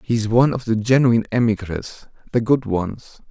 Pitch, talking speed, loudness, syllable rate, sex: 115 Hz, 180 wpm, -19 LUFS, 5.3 syllables/s, male